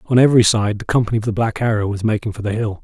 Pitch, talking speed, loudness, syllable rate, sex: 110 Hz, 295 wpm, -17 LUFS, 7.4 syllables/s, male